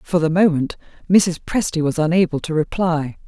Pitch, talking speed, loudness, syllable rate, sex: 165 Hz, 165 wpm, -19 LUFS, 4.9 syllables/s, female